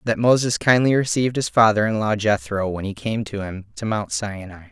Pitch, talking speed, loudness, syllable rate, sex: 105 Hz, 215 wpm, -20 LUFS, 5.4 syllables/s, male